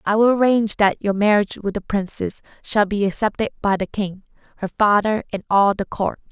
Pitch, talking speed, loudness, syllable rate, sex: 205 Hz, 200 wpm, -20 LUFS, 5.5 syllables/s, female